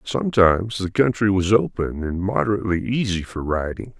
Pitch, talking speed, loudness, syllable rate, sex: 100 Hz, 150 wpm, -21 LUFS, 5.5 syllables/s, male